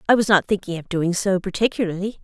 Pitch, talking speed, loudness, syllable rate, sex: 190 Hz, 215 wpm, -21 LUFS, 6.3 syllables/s, female